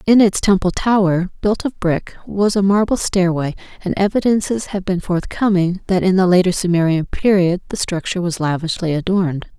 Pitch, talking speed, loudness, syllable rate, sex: 185 Hz, 170 wpm, -17 LUFS, 5.2 syllables/s, female